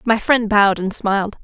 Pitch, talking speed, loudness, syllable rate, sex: 210 Hz, 210 wpm, -16 LUFS, 5.3 syllables/s, female